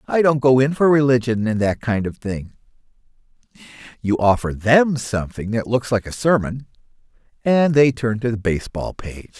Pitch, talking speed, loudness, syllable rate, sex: 120 Hz, 170 wpm, -19 LUFS, 5.0 syllables/s, male